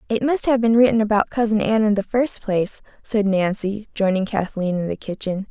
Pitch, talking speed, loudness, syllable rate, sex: 210 Hz, 205 wpm, -20 LUFS, 5.4 syllables/s, female